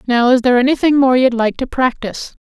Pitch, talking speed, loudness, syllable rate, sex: 255 Hz, 220 wpm, -14 LUFS, 6.3 syllables/s, female